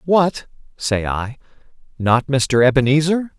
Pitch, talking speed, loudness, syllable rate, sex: 135 Hz, 105 wpm, -18 LUFS, 3.8 syllables/s, male